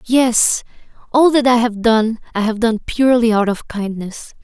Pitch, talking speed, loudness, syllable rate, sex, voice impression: 230 Hz, 175 wpm, -15 LUFS, 4.4 syllables/s, female, very feminine, very young, very thin, tensed, very powerful, very bright, hard, very clear, very fluent, very cute, slightly cool, slightly intellectual, very refreshing, slightly sincere, slightly calm, very friendly, very reassuring, very unique, slightly elegant, wild, slightly sweet, very lively, strict, very intense, slightly sharp, light